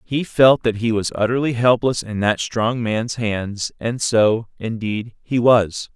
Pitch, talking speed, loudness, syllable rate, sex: 115 Hz, 170 wpm, -19 LUFS, 3.8 syllables/s, male